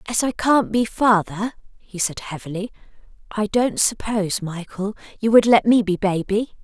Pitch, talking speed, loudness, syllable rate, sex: 210 Hz, 165 wpm, -20 LUFS, 4.7 syllables/s, female